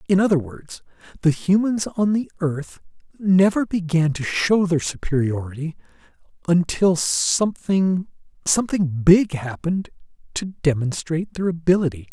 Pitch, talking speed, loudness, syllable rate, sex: 170 Hz, 110 wpm, -21 LUFS, 4.6 syllables/s, male